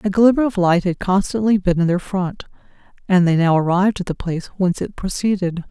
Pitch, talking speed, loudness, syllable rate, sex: 185 Hz, 210 wpm, -18 LUFS, 6.0 syllables/s, female